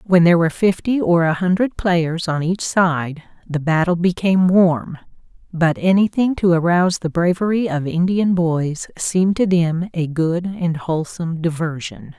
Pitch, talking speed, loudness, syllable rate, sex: 175 Hz, 160 wpm, -18 LUFS, 4.7 syllables/s, female